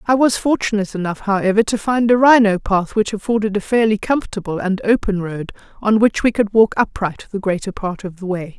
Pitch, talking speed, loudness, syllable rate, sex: 205 Hz, 210 wpm, -17 LUFS, 5.7 syllables/s, female